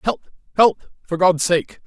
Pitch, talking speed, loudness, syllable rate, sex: 180 Hz, 160 wpm, -18 LUFS, 3.7 syllables/s, female